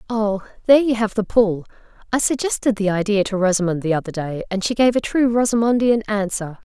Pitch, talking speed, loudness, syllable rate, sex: 210 Hz, 190 wpm, -19 LUFS, 5.9 syllables/s, female